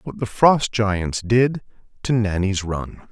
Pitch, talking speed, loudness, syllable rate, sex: 110 Hz, 155 wpm, -20 LUFS, 3.6 syllables/s, male